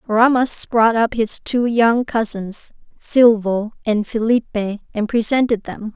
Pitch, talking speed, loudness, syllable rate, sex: 225 Hz, 130 wpm, -17 LUFS, 4.0 syllables/s, female